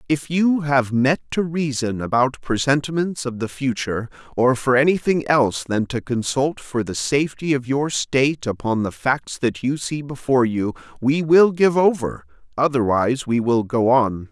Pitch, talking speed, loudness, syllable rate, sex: 135 Hz, 170 wpm, -20 LUFS, 4.7 syllables/s, male